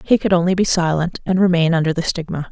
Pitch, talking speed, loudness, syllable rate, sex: 170 Hz, 240 wpm, -17 LUFS, 6.4 syllables/s, female